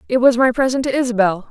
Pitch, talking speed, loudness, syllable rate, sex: 245 Hz, 240 wpm, -16 LUFS, 6.8 syllables/s, female